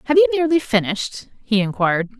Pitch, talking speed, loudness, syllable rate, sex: 245 Hz, 165 wpm, -19 LUFS, 6.7 syllables/s, female